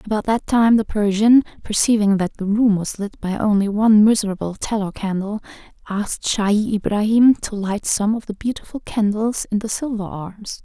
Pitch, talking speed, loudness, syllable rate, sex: 210 Hz, 175 wpm, -19 LUFS, 5.0 syllables/s, female